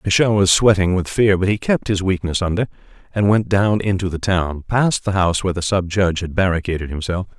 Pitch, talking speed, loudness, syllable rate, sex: 95 Hz, 220 wpm, -18 LUFS, 6.0 syllables/s, male